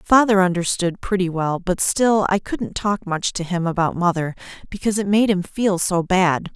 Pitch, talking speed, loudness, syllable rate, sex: 185 Hz, 190 wpm, -20 LUFS, 4.8 syllables/s, female